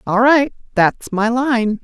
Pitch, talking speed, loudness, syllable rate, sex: 235 Hz, 130 wpm, -16 LUFS, 3.3 syllables/s, female